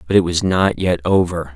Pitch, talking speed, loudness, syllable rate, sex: 90 Hz, 230 wpm, -17 LUFS, 5.2 syllables/s, male